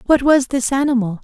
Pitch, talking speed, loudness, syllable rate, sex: 260 Hz, 195 wpm, -16 LUFS, 5.6 syllables/s, female